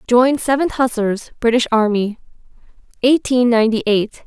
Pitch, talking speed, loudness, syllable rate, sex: 235 Hz, 115 wpm, -16 LUFS, 5.2 syllables/s, female